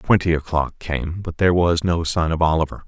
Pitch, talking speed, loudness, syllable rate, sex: 80 Hz, 210 wpm, -20 LUFS, 5.4 syllables/s, male